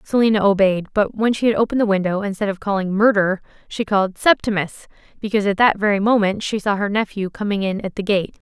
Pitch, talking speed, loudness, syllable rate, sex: 205 Hz, 210 wpm, -19 LUFS, 6.3 syllables/s, female